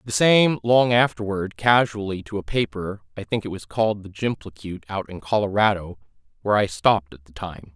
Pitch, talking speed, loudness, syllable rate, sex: 100 Hz, 170 wpm, -22 LUFS, 5.1 syllables/s, male